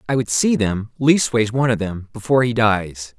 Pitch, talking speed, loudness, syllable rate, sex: 115 Hz, 190 wpm, -18 LUFS, 5.2 syllables/s, male